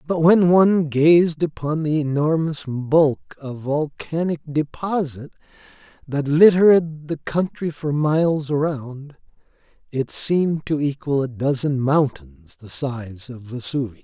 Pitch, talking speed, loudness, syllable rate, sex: 145 Hz, 125 wpm, -20 LUFS, 4.0 syllables/s, male